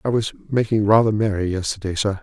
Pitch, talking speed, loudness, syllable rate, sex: 105 Hz, 190 wpm, -20 LUFS, 5.7 syllables/s, male